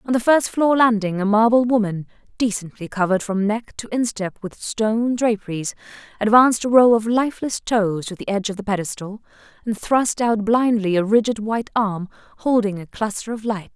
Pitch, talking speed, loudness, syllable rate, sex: 215 Hz, 185 wpm, -20 LUFS, 5.4 syllables/s, female